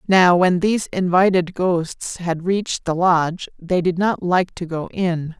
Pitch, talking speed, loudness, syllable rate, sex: 175 Hz, 180 wpm, -19 LUFS, 4.1 syllables/s, female